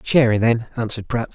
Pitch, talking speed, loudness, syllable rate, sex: 115 Hz, 180 wpm, -20 LUFS, 6.0 syllables/s, male